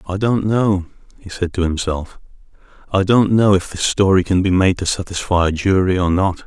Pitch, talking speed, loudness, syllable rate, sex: 95 Hz, 205 wpm, -17 LUFS, 5.2 syllables/s, male